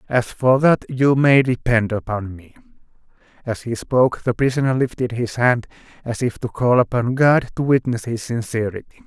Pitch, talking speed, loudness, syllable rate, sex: 120 Hz, 170 wpm, -19 LUFS, 5.0 syllables/s, male